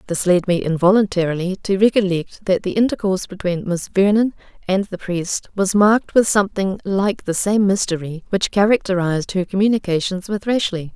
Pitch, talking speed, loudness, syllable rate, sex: 190 Hz, 160 wpm, -18 LUFS, 5.5 syllables/s, female